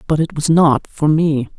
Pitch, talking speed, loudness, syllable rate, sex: 150 Hz, 225 wpm, -15 LUFS, 4.5 syllables/s, male